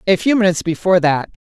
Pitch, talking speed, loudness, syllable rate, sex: 180 Hz, 205 wpm, -16 LUFS, 7.6 syllables/s, female